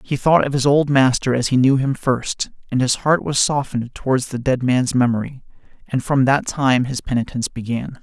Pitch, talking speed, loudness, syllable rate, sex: 130 Hz, 210 wpm, -18 LUFS, 5.2 syllables/s, male